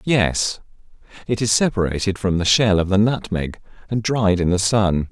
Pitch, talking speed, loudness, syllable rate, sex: 100 Hz, 175 wpm, -19 LUFS, 4.7 syllables/s, male